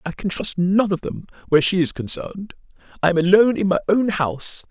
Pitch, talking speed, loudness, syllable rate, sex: 185 Hz, 215 wpm, -19 LUFS, 6.1 syllables/s, male